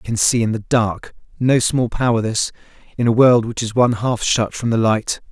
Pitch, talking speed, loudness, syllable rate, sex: 115 Hz, 225 wpm, -17 LUFS, 5.2 syllables/s, male